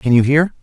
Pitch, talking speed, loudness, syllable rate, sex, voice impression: 140 Hz, 290 wpm, -14 LUFS, 5.7 syllables/s, male, masculine, adult-like, slightly thick, cool, sincere, slightly calm, slightly elegant